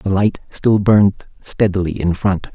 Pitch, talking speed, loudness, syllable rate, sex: 100 Hz, 165 wpm, -16 LUFS, 4.7 syllables/s, male